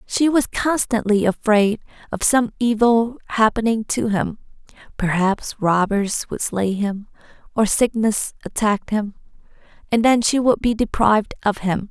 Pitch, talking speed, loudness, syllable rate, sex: 220 Hz, 130 wpm, -19 LUFS, 4.2 syllables/s, female